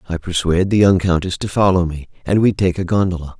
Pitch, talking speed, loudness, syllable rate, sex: 90 Hz, 230 wpm, -17 LUFS, 6.3 syllables/s, male